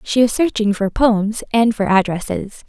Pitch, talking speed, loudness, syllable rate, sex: 215 Hz, 180 wpm, -17 LUFS, 4.4 syllables/s, female